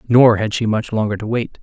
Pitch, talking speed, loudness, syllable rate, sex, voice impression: 110 Hz, 260 wpm, -17 LUFS, 5.4 syllables/s, male, very masculine, adult-like, slightly middle-aged, thick, tensed, slightly weak, slightly bright, hard, clear, fluent, slightly cool, intellectual, refreshing, very sincere, calm, mature, friendly, reassuring, slightly unique, slightly wild, slightly sweet, slightly lively, kind, modest